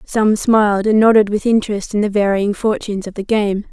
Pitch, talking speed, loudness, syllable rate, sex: 210 Hz, 210 wpm, -15 LUFS, 5.6 syllables/s, female